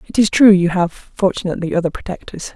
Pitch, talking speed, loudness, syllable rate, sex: 185 Hz, 190 wpm, -16 LUFS, 6.2 syllables/s, female